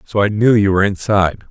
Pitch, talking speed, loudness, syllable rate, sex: 100 Hz, 240 wpm, -14 LUFS, 6.9 syllables/s, male